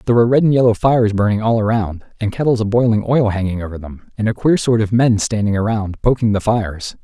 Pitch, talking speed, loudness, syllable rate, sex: 110 Hz, 240 wpm, -16 LUFS, 6.2 syllables/s, male